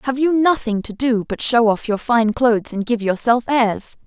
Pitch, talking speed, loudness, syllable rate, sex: 235 Hz, 220 wpm, -18 LUFS, 4.7 syllables/s, female